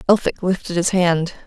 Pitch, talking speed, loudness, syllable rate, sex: 180 Hz, 165 wpm, -19 LUFS, 5.1 syllables/s, female